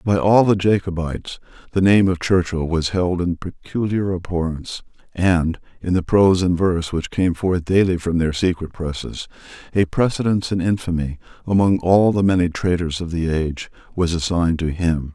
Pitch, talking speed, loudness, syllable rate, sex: 90 Hz, 170 wpm, -19 LUFS, 5.2 syllables/s, male